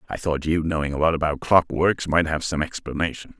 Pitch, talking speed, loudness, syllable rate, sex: 80 Hz, 230 wpm, -22 LUFS, 5.7 syllables/s, male